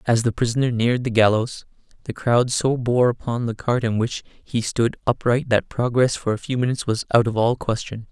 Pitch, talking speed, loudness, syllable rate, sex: 120 Hz, 215 wpm, -21 LUFS, 5.3 syllables/s, male